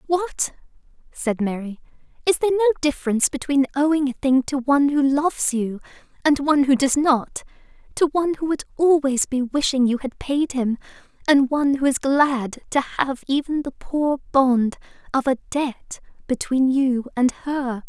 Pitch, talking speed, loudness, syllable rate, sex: 275 Hz, 170 wpm, -21 LUFS, 4.8 syllables/s, female